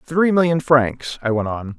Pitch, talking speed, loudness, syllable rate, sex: 135 Hz, 200 wpm, -18 LUFS, 4.2 syllables/s, male